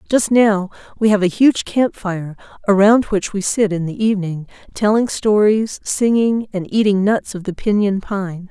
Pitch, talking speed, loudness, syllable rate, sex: 205 Hz, 175 wpm, -17 LUFS, 4.5 syllables/s, female